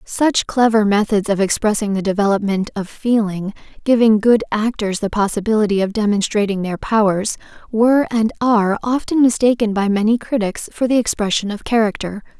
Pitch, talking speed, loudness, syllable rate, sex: 215 Hz, 150 wpm, -17 LUFS, 5.4 syllables/s, female